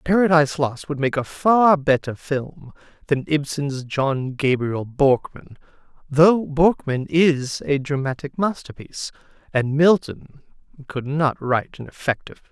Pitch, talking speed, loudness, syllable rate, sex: 145 Hz, 130 wpm, -20 LUFS, 4.3 syllables/s, male